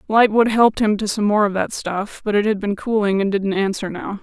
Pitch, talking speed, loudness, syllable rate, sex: 205 Hz, 255 wpm, -19 LUFS, 5.5 syllables/s, female